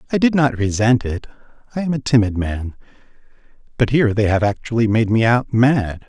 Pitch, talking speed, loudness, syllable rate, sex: 115 Hz, 190 wpm, -17 LUFS, 5.5 syllables/s, male